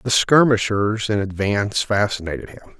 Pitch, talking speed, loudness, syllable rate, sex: 105 Hz, 130 wpm, -19 LUFS, 5.1 syllables/s, male